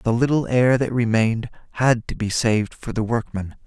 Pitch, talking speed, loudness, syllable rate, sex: 115 Hz, 195 wpm, -21 LUFS, 5.2 syllables/s, male